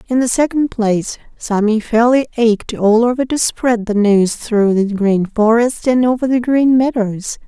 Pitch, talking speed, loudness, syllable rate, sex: 230 Hz, 175 wpm, -14 LUFS, 4.3 syllables/s, female